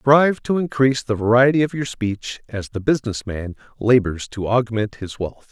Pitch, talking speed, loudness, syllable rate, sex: 120 Hz, 185 wpm, -20 LUFS, 5.1 syllables/s, male